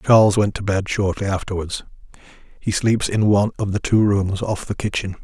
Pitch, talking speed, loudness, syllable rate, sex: 100 Hz, 185 wpm, -20 LUFS, 5.5 syllables/s, male